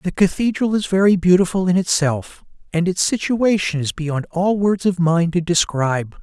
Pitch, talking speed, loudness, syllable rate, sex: 180 Hz, 175 wpm, -18 LUFS, 4.8 syllables/s, male